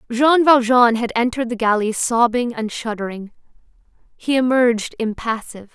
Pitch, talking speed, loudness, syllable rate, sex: 235 Hz, 125 wpm, -18 LUFS, 5.2 syllables/s, female